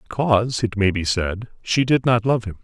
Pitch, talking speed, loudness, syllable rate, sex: 110 Hz, 230 wpm, -20 LUFS, 5.3 syllables/s, male